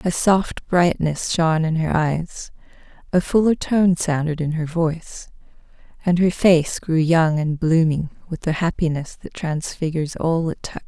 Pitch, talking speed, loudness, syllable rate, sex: 165 Hz, 160 wpm, -20 LUFS, 4.5 syllables/s, female